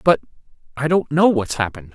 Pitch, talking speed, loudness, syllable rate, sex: 140 Hz, 185 wpm, -19 LUFS, 6.3 syllables/s, male